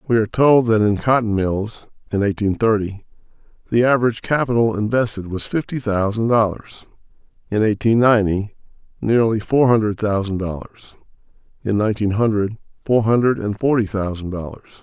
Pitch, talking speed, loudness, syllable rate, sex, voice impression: 110 Hz, 140 wpm, -19 LUFS, 5.6 syllables/s, male, very masculine, middle-aged, thick, cool, intellectual, slightly calm